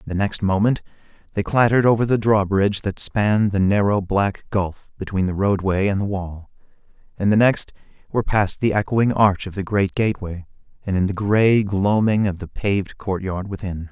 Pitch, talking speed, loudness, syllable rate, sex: 100 Hz, 185 wpm, -20 LUFS, 5.1 syllables/s, male